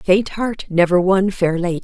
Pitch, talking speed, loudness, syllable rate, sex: 185 Hz, 195 wpm, -17 LUFS, 4.7 syllables/s, female